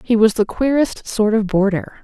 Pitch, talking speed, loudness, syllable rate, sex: 220 Hz, 205 wpm, -17 LUFS, 4.7 syllables/s, female